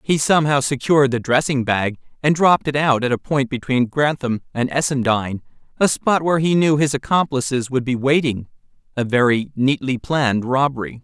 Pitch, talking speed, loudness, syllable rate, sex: 135 Hz, 165 wpm, -18 LUFS, 5.4 syllables/s, male